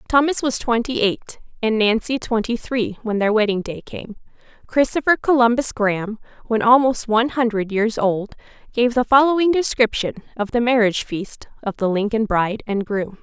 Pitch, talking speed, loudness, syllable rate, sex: 230 Hz, 165 wpm, -19 LUFS, 5.1 syllables/s, female